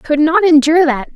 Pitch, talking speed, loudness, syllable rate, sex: 310 Hz, 260 wpm, -11 LUFS, 6.4 syllables/s, female